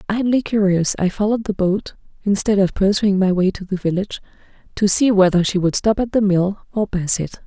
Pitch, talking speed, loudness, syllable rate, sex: 195 Hz, 210 wpm, -18 LUFS, 5.6 syllables/s, female